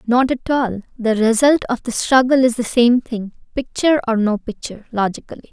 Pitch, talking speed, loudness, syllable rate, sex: 240 Hz, 165 wpm, -17 LUFS, 5.4 syllables/s, female